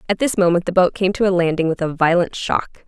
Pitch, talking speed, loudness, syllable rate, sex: 180 Hz, 270 wpm, -18 LUFS, 6.0 syllables/s, female